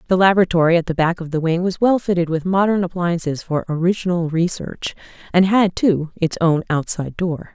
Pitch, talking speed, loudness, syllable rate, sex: 175 Hz, 190 wpm, -19 LUFS, 5.6 syllables/s, female